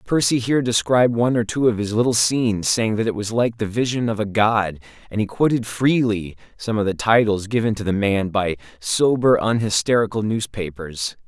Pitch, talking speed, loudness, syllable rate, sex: 110 Hz, 190 wpm, -20 LUFS, 5.3 syllables/s, male